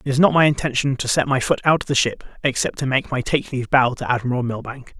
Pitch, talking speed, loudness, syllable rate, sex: 130 Hz, 275 wpm, -20 LUFS, 6.3 syllables/s, male